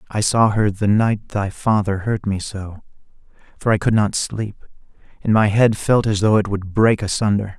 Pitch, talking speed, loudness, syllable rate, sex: 105 Hz, 200 wpm, -18 LUFS, 4.6 syllables/s, male